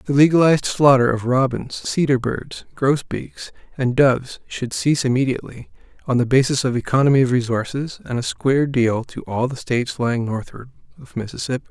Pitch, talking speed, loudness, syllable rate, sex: 130 Hz, 165 wpm, -19 LUFS, 5.6 syllables/s, male